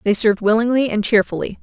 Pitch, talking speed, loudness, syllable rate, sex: 220 Hz, 185 wpm, -17 LUFS, 6.6 syllables/s, female